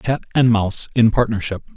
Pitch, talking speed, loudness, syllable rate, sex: 110 Hz, 170 wpm, -18 LUFS, 5.6 syllables/s, male